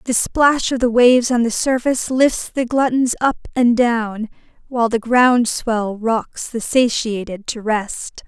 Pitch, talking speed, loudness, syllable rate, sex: 235 Hz, 165 wpm, -17 LUFS, 4.0 syllables/s, female